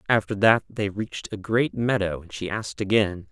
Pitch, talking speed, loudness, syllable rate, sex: 105 Hz, 200 wpm, -24 LUFS, 5.3 syllables/s, male